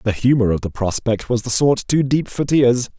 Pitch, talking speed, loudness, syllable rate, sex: 125 Hz, 240 wpm, -18 LUFS, 5.0 syllables/s, male